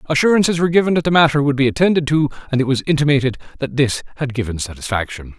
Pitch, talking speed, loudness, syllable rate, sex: 140 Hz, 210 wpm, -17 LUFS, 7.5 syllables/s, male